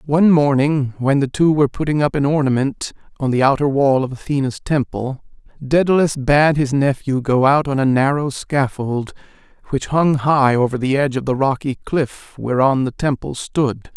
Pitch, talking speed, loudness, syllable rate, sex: 140 Hz, 175 wpm, -17 LUFS, 4.9 syllables/s, male